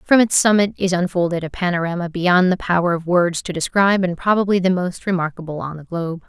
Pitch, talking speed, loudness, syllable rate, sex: 180 Hz, 210 wpm, -18 LUFS, 6.1 syllables/s, female